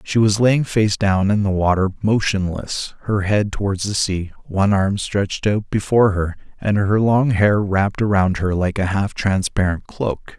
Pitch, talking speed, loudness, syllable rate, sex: 100 Hz, 185 wpm, -19 LUFS, 4.6 syllables/s, male